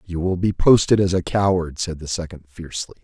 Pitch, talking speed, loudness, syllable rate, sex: 85 Hz, 220 wpm, -20 LUFS, 5.7 syllables/s, male